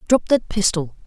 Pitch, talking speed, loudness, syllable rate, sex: 220 Hz, 170 wpm, -19 LUFS, 4.9 syllables/s, female